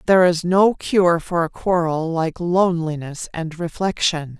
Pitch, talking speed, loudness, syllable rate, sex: 170 Hz, 150 wpm, -19 LUFS, 4.3 syllables/s, female